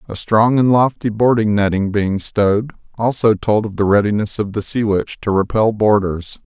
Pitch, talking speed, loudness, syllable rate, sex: 110 Hz, 185 wpm, -16 LUFS, 4.8 syllables/s, male